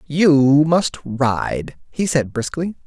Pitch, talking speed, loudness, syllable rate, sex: 150 Hz, 125 wpm, -18 LUFS, 2.8 syllables/s, male